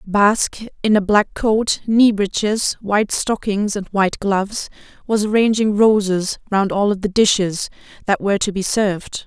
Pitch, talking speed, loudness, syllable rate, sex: 205 Hz, 160 wpm, -18 LUFS, 4.5 syllables/s, female